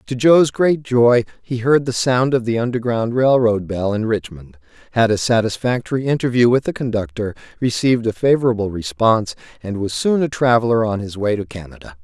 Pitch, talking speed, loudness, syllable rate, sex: 115 Hz, 175 wpm, -18 LUFS, 5.4 syllables/s, male